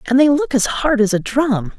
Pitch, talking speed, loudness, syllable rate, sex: 255 Hz, 270 wpm, -16 LUFS, 4.9 syllables/s, female